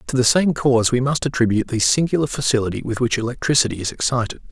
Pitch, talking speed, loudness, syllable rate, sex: 125 Hz, 200 wpm, -19 LUFS, 7.0 syllables/s, male